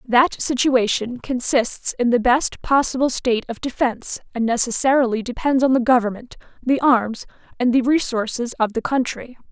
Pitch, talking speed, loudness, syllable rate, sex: 245 Hz, 150 wpm, -19 LUFS, 5.0 syllables/s, female